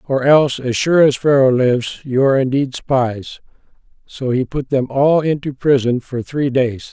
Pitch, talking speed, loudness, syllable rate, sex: 135 Hz, 180 wpm, -16 LUFS, 4.6 syllables/s, male